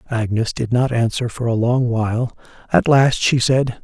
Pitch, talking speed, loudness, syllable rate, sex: 120 Hz, 190 wpm, -18 LUFS, 4.6 syllables/s, male